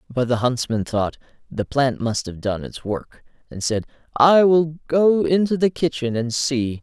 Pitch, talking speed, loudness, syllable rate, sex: 135 Hz, 185 wpm, -20 LUFS, 4.2 syllables/s, male